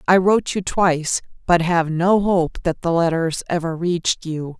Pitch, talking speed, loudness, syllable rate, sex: 170 Hz, 185 wpm, -19 LUFS, 4.7 syllables/s, female